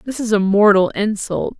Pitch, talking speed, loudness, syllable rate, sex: 205 Hz, 190 wpm, -16 LUFS, 4.5 syllables/s, female